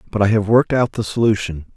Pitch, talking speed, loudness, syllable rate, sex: 105 Hz, 240 wpm, -17 LUFS, 6.9 syllables/s, male